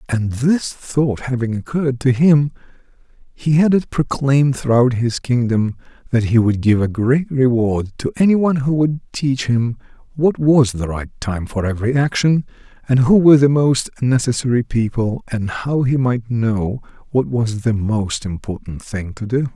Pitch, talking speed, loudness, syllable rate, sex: 125 Hz, 170 wpm, -17 LUFS, 4.6 syllables/s, male